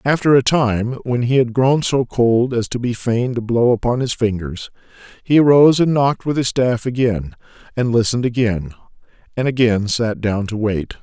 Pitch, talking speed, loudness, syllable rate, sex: 120 Hz, 190 wpm, -17 LUFS, 5.0 syllables/s, male